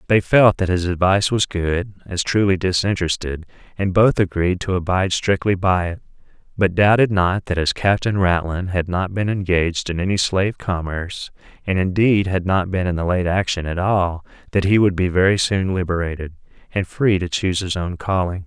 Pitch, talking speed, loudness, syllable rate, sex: 95 Hz, 190 wpm, -19 LUFS, 5.3 syllables/s, male